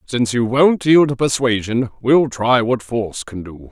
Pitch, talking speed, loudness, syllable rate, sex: 120 Hz, 195 wpm, -16 LUFS, 4.6 syllables/s, male